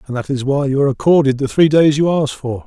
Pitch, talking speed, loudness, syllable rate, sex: 140 Hz, 295 wpm, -15 LUFS, 6.3 syllables/s, male